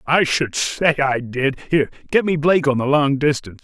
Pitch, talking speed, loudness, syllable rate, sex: 145 Hz, 215 wpm, -18 LUFS, 5.3 syllables/s, male